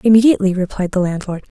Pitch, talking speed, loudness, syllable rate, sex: 195 Hz, 150 wpm, -16 LUFS, 7.3 syllables/s, female